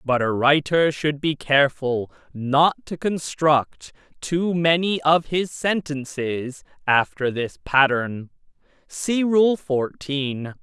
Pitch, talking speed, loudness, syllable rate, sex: 145 Hz, 115 wpm, -21 LUFS, 3.2 syllables/s, male